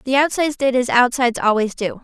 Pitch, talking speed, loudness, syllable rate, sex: 255 Hz, 205 wpm, -17 LUFS, 6.4 syllables/s, female